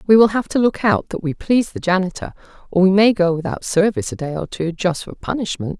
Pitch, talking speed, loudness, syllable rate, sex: 185 Hz, 250 wpm, -18 LUFS, 6.0 syllables/s, female